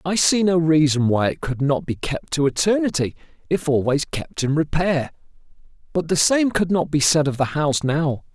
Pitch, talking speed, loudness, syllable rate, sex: 155 Hz, 200 wpm, -20 LUFS, 5.0 syllables/s, male